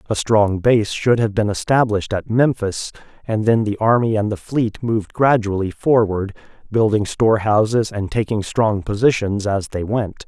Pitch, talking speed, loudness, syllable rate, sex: 110 Hz, 165 wpm, -18 LUFS, 4.7 syllables/s, male